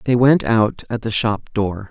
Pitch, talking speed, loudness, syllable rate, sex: 110 Hz, 220 wpm, -18 LUFS, 4.1 syllables/s, male